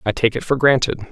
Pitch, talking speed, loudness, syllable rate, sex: 120 Hz, 270 wpm, -17 LUFS, 6.9 syllables/s, male